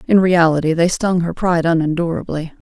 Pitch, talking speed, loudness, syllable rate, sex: 170 Hz, 155 wpm, -16 LUFS, 5.8 syllables/s, female